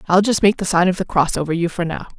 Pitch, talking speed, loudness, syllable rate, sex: 180 Hz, 330 wpm, -18 LUFS, 6.7 syllables/s, female